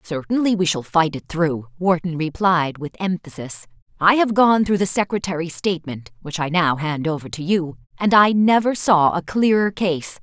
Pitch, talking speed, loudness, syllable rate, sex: 175 Hz, 175 wpm, -19 LUFS, 4.8 syllables/s, female